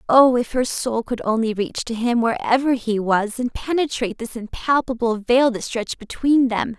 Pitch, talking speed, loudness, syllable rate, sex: 235 Hz, 185 wpm, -20 LUFS, 4.8 syllables/s, female